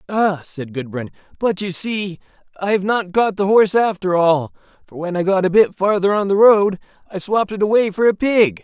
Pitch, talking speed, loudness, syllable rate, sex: 190 Hz, 210 wpm, -17 LUFS, 5.3 syllables/s, male